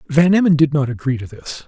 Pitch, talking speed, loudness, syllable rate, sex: 150 Hz, 250 wpm, -16 LUFS, 5.9 syllables/s, male